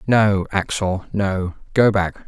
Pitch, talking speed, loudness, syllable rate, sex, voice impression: 100 Hz, 130 wpm, -20 LUFS, 3.3 syllables/s, male, masculine, adult-like, slightly powerful, hard, clear, slightly halting, cute, intellectual, calm, slightly mature, wild, slightly strict